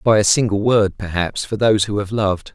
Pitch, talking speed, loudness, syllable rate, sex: 105 Hz, 235 wpm, -18 LUFS, 5.6 syllables/s, male